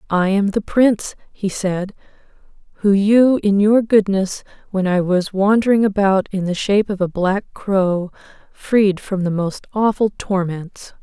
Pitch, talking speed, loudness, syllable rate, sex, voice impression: 200 Hz, 160 wpm, -17 LUFS, 4.1 syllables/s, female, very feminine, slightly young, very adult-like, slightly thin, slightly relaxed, weak, slightly dark, soft, very clear, fluent, slightly cute, cool, very intellectual, refreshing, very sincere, very calm, very friendly, reassuring, slightly unique, very elegant, wild, sweet, slightly lively, kind, slightly intense, modest